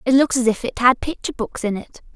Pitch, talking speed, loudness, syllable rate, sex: 245 Hz, 280 wpm, -20 LUFS, 6.2 syllables/s, female